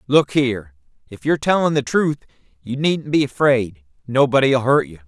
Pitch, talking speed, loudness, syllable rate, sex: 130 Hz, 165 wpm, -18 LUFS, 5.2 syllables/s, male